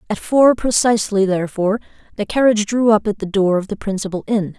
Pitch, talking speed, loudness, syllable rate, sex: 210 Hz, 195 wpm, -17 LUFS, 6.3 syllables/s, female